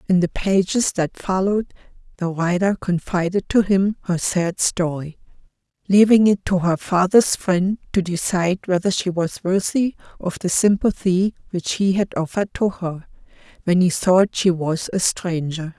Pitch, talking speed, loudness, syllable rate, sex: 185 Hz, 155 wpm, -20 LUFS, 4.6 syllables/s, female